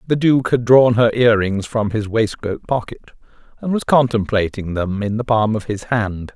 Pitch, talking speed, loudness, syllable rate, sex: 115 Hz, 200 wpm, -17 LUFS, 4.8 syllables/s, male